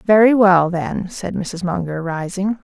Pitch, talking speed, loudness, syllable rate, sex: 185 Hz, 155 wpm, -18 LUFS, 4.0 syllables/s, female